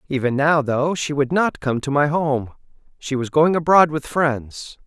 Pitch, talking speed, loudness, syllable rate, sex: 145 Hz, 195 wpm, -19 LUFS, 4.4 syllables/s, male